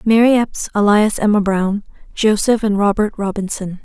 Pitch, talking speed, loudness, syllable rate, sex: 210 Hz, 125 wpm, -16 LUFS, 4.8 syllables/s, female